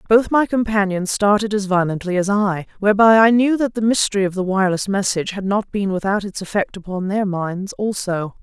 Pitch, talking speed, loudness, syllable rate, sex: 200 Hz, 200 wpm, -18 LUFS, 5.6 syllables/s, female